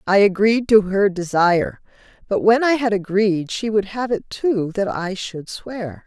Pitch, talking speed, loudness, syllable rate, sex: 200 Hz, 190 wpm, -19 LUFS, 4.2 syllables/s, female